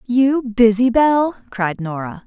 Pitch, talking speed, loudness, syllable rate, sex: 235 Hz, 130 wpm, -17 LUFS, 4.0 syllables/s, female